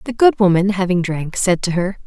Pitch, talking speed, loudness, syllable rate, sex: 190 Hz, 235 wpm, -17 LUFS, 5.3 syllables/s, female